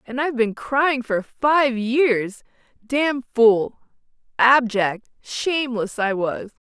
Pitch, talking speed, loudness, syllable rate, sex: 245 Hz, 115 wpm, -20 LUFS, 3.4 syllables/s, female